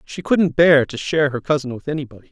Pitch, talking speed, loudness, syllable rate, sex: 150 Hz, 235 wpm, -18 LUFS, 6.3 syllables/s, male